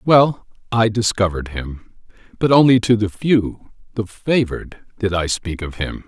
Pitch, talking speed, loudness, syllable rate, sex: 105 Hz, 160 wpm, -18 LUFS, 4.5 syllables/s, male